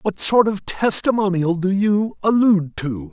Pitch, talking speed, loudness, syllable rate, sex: 190 Hz, 155 wpm, -18 LUFS, 4.4 syllables/s, male